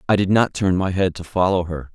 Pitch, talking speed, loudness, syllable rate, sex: 95 Hz, 280 wpm, -20 LUFS, 5.6 syllables/s, male